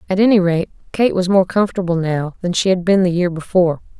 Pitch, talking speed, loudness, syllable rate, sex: 180 Hz, 225 wpm, -16 LUFS, 6.2 syllables/s, female